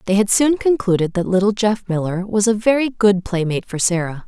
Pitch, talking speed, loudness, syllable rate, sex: 205 Hz, 210 wpm, -18 LUFS, 5.6 syllables/s, female